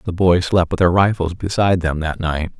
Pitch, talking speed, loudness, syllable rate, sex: 90 Hz, 230 wpm, -17 LUFS, 5.5 syllables/s, male